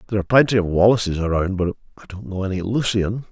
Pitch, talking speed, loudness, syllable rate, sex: 100 Hz, 215 wpm, -19 LUFS, 7.4 syllables/s, male